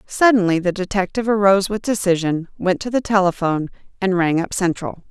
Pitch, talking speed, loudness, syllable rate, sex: 190 Hz, 165 wpm, -19 LUFS, 5.9 syllables/s, female